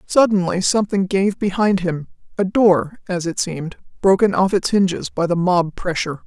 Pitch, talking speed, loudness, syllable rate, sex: 185 Hz, 165 wpm, -18 LUFS, 5.1 syllables/s, female